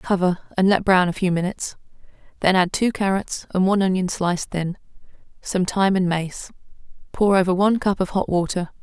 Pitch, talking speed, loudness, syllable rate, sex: 185 Hz, 185 wpm, -21 LUFS, 5.7 syllables/s, female